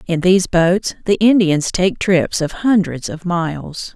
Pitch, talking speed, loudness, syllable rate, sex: 175 Hz, 165 wpm, -16 LUFS, 4.1 syllables/s, female